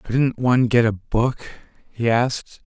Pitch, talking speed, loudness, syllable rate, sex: 120 Hz, 155 wpm, -20 LUFS, 3.9 syllables/s, male